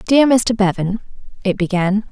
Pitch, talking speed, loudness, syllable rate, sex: 210 Hz, 140 wpm, -17 LUFS, 4.6 syllables/s, female